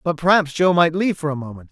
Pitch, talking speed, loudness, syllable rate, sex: 160 Hz, 280 wpm, -18 LUFS, 6.8 syllables/s, male